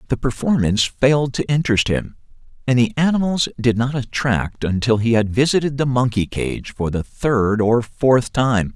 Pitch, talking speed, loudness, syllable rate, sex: 120 Hz, 170 wpm, -18 LUFS, 4.8 syllables/s, male